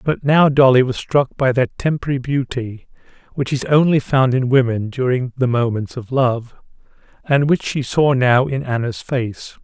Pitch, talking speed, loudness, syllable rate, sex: 130 Hz, 175 wpm, -17 LUFS, 4.6 syllables/s, male